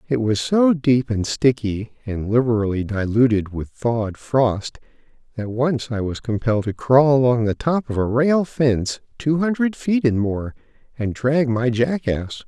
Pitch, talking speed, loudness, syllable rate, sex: 125 Hz, 170 wpm, -20 LUFS, 4.3 syllables/s, male